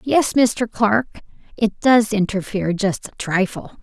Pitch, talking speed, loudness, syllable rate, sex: 215 Hz, 140 wpm, -19 LUFS, 4.2 syllables/s, female